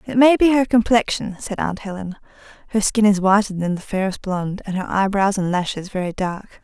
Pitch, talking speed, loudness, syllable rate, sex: 200 Hz, 210 wpm, -19 LUFS, 5.4 syllables/s, female